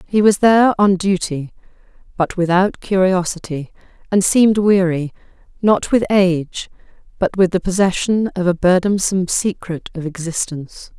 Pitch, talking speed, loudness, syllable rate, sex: 185 Hz, 130 wpm, -17 LUFS, 4.9 syllables/s, female